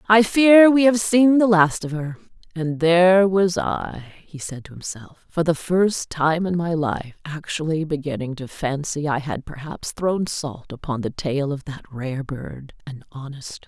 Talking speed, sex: 185 wpm, female